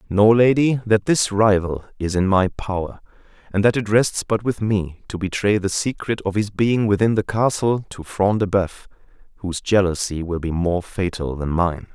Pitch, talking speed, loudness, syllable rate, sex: 100 Hz, 190 wpm, -20 LUFS, 4.7 syllables/s, male